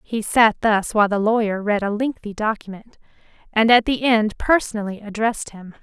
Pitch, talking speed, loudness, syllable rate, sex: 215 Hz, 175 wpm, -19 LUFS, 5.2 syllables/s, female